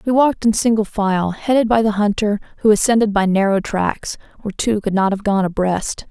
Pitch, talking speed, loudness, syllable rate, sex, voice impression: 210 Hz, 205 wpm, -17 LUFS, 5.5 syllables/s, female, feminine, slightly adult-like, slightly refreshing, slightly sincere, slightly friendly